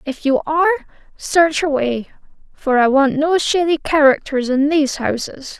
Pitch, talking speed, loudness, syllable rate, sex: 295 Hz, 150 wpm, -16 LUFS, 4.7 syllables/s, female